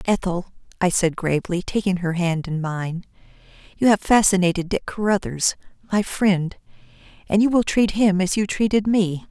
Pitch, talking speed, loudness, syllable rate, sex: 185 Hz, 160 wpm, -21 LUFS, 4.9 syllables/s, female